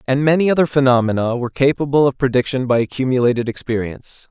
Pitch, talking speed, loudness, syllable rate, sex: 130 Hz, 155 wpm, -17 LUFS, 6.7 syllables/s, male